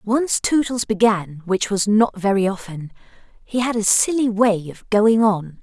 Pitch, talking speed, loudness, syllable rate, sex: 210 Hz, 170 wpm, -19 LUFS, 4.2 syllables/s, female